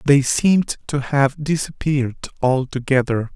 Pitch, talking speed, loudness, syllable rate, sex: 140 Hz, 105 wpm, -19 LUFS, 4.5 syllables/s, male